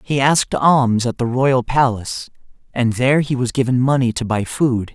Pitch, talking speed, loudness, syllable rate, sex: 125 Hz, 195 wpm, -17 LUFS, 5.0 syllables/s, male